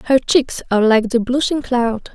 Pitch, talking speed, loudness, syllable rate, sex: 245 Hz, 195 wpm, -16 LUFS, 4.9 syllables/s, female